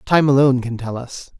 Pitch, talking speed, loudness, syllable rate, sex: 130 Hz, 215 wpm, -17 LUFS, 5.7 syllables/s, male